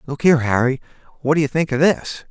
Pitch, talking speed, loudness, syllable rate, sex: 140 Hz, 210 wpm, -18 LUFS, 5.8 syllables/s, male